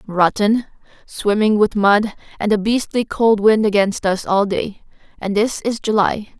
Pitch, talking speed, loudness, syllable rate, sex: 210 Hz, 160 wpm, -17 LUFS, 4.2 syllables/s, female